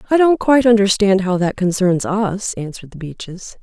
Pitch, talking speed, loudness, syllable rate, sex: 200 Hz, 180 wpm, -16 LUFS, 5.3 syllables/s, female